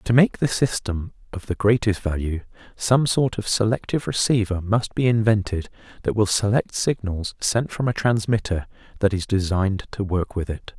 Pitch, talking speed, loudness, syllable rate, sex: 105 Hz, 175 wpm, -22 LUFS, 5.0 syllables/s, male